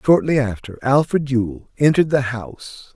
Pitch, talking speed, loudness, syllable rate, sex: 135 Hz, 140 wpm, -19 LUFS, 4.9 syllables/s, male